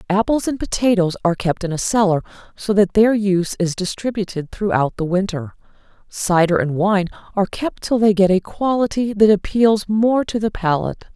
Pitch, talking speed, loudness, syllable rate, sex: 200 Hz, 180 wpm, -18 LUFS, 5.3 syllables/s, female